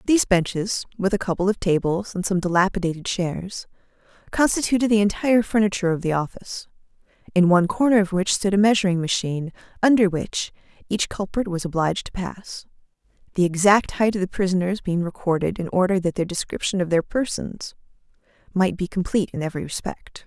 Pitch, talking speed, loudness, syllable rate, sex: 190 Hz, 170 wpm, -22 LUFS, 6.0 syllables/s, female